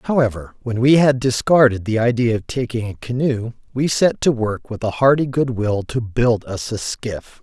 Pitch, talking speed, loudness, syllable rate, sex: 120 Hz, 200 wpm, -19 LUFS, 4.6 syllables/s, male